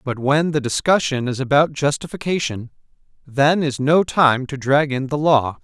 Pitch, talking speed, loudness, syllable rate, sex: 140 Hz, 170 wpm, -18 LUFS, 4.6 syllables/s, male